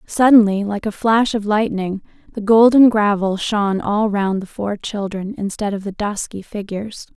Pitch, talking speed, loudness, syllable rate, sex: 205 Hz, 165 wpm, -17 LUFS, 4.6 syllables/s, female